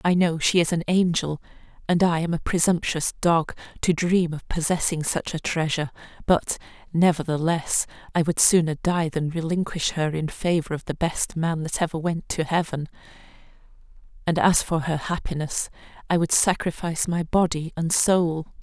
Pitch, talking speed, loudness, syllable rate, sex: 165 Hz, 160 wpm, -23 LUFS, 4.9 syllables/s, female